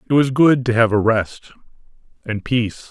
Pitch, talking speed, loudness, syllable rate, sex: 120 Hz, 165 wpm, -17 LUFS, 4.8 syllables/s, male